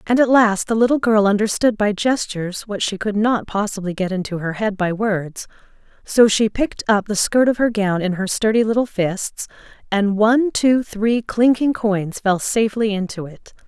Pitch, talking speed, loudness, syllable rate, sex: 210 Hz, 195 wpm, -18 LUFS, 4.8 syllables/s, female